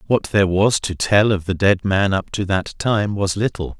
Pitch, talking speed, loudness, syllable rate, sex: 100 Hz, 235 wpm, -18 LUFS, 4.8 syllables/s, male